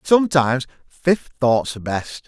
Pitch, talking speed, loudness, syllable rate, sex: 135 Hz, 130 wpm, -20 LUFS, 4.8 syllables/s, male